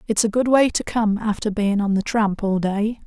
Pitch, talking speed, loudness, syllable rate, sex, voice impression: 215 Hz, 255 wpm, -20 LUFS, 4.9 syllables/s, female, feminine, slightly adult-like, slightly cute, slightly calm, slightly friendly